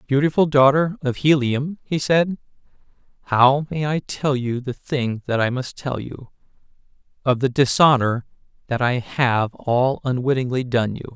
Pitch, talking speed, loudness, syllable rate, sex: 135 Hz, 145 wpm, -20 LUFS, 4.4 syllables/s, male